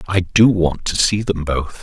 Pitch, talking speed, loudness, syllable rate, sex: 90 Hz, 230 wpm, -17 LUFS, 4.2 syllables/s, male